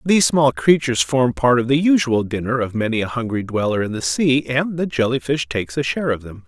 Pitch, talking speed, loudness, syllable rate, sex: 125 Hz, 240 wpm, -19 LUFS, 5.8 syllables/s, male